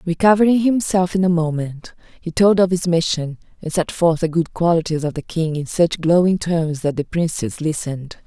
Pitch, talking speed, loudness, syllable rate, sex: 170 Hz, 195 wpm, -18 LUFS, 5.1 syllables/s, female